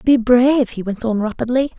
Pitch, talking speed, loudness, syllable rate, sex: 240 Hz, 200 wpm, -17 LUFS, 5.2 syllables/s, female